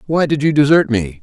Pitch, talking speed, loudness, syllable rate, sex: 135 Hz, 245 wpm, -14 LUFS, 5.6 syllables/s, male